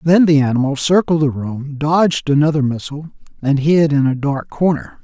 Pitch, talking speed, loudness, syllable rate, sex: 145 Hz, 180 wpm, -16 LUFS, 5.2 syllables/s, male